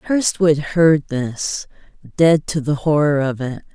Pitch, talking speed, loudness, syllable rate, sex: 150 Hz, 145 wpm, -18 LUFS, 3.5 syllables/s, female